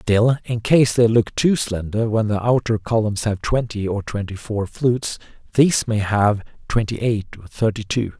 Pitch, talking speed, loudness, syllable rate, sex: 110 Hz, 185 wpm, -20 LUFS, 4.6 syllables/s, male